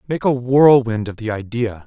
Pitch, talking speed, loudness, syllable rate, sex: 120 Hz, 195 wpm, -17 LUFS, 4.7 syllables/s, male